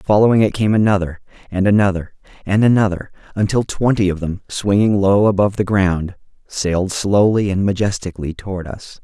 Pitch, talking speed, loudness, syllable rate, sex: 100 Hz, 155 wpm, -17 LUFS, 5.5 syllables/s, male